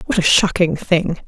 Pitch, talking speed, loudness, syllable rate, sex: 180 Hz, 190 wpm, -16 LUFS, 4.7 syllables/s, female